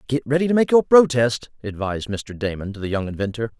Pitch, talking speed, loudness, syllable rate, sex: 120 Hz, 215 wpm, -20 LUFS, 6.1 syllables/s, male